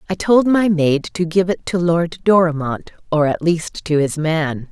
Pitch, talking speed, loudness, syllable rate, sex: 170 Hz, 190 wpm, -17 LUFS, 4.3 syllables/s, female